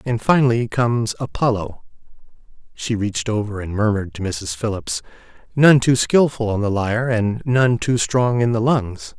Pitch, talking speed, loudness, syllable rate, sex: 110 Hz, 165 wpm, -19 LUFS, 4.9 syllables/s, male